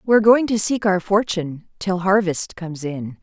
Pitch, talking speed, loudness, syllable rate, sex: 190 Hz, 185 wpm, -19 LUFS, 5.0 syllables/s, female